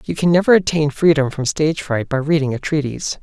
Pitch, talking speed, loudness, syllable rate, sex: 150 Hz, 225 wpm, -17 LUFS, 6.1 syllables/s, male